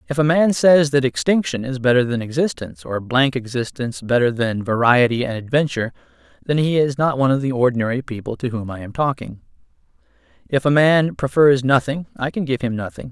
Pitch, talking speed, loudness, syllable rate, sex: 130 Hz, 190 wpm, -19 LUFS, 5.8 syllables/s, male